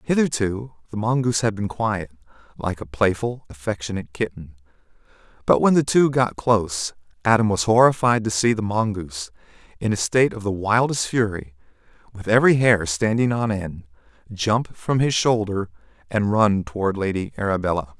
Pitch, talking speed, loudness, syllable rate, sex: 105 Hz, 155 wpm, -21 LUFS, 5.3 syllables/s, male